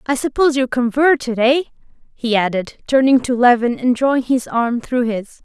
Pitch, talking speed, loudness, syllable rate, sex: 250 Hz, 175 wpm, -16 LUFS, 5.4 syllables/s, female